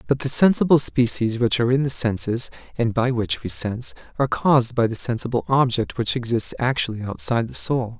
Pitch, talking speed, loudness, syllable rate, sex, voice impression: 125 Hz, 195 wpm, -21 LUFS, 5.7 syllables/s, male, very masculine, very adult-like, slightly middle-aged, thick, slightly tensed, slightly weak, slightly dark, very soft, slightly muffled, fluent, slightly raspy, cool, very intellectual, slightly refreshing, sincere, calm, slightly mature, friendly, reassuring, very unique, elegant, sweet, slightly lively, kind, slightly modest